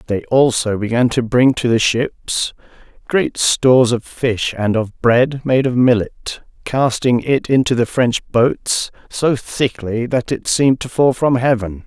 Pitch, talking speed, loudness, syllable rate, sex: 125 Hz, 165 wpm, -16 LUFS, 3.9 syllables/s, male